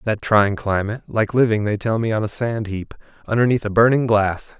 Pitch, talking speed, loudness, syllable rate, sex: 110 Hz, 195 wpm, -19 LUFS, 5.7 syllables/s, male